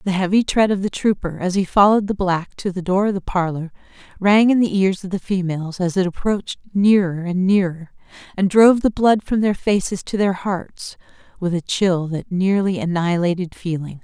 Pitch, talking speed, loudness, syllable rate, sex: 190 Hz, 200 wpm, -19 LUFS, 5.3 syllables/s, female